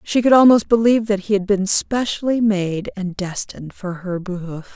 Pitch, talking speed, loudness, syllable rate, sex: 200 Hz, 190 wpm, -18 LUFS, 5.0 syllables/s, female